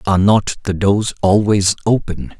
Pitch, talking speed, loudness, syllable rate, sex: 100 Hz, 150 wpm, -15 LUFS, 4.6 syllables/s, male